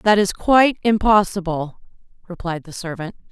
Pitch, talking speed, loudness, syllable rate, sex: 190 Hz, 125 wpm, -18 LUFS, 4.9 syllables/s, female